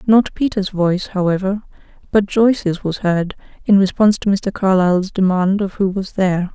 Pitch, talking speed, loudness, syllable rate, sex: 195 Hz, 165 wpm, -17 LUFS, 5.2 syllables/s, female